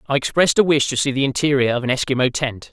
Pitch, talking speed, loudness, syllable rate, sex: 135 Hz, 265 wpm, -18 LUFS, 7.0 syllables/s, male